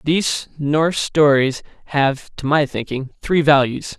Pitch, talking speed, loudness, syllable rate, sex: 145 Hz, 135 wpm, -18 LUFS, 4.1 syllables/s, male